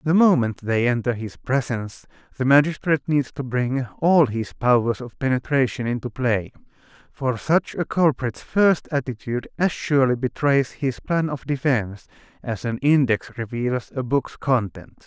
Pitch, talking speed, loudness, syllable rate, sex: 130 Hz, 150 wpm, -22 LUFS, 4.6 syllables/s, male